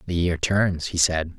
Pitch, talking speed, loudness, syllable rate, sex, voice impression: 85 Hz, 215 wpm, -22 LUFS, 4.2 syllables/s, male, very masculine, very adult-like, middle-aged, very thick, slightly relaxed, slightly weak, slightly dark, slightly hard, slightly muffled, slightly fluent, cool, intellectual, slightly refreshing, very sincere, very calm, mature, very friendly, very reassuring, unique, slightly elegant, wild, sweet, very kind, modest